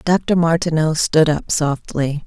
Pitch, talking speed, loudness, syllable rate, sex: 160 Hz, 135 wpm, -17 LUFS, 3.7 syllables/s, female